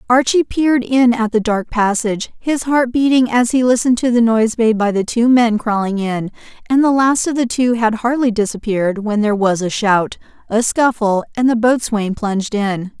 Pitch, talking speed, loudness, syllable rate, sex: 230 Hz, 205 wpm, -15 LUFS, 5.1 syllables/s, female